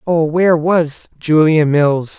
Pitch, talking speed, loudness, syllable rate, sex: 160 Hz, 135 wpm, -14 LUFS, 3.6 syllables/s, male